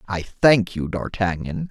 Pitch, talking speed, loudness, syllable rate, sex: 100 Hz, 140 wpm, -21 LUFS, 4.4 syllables/s, male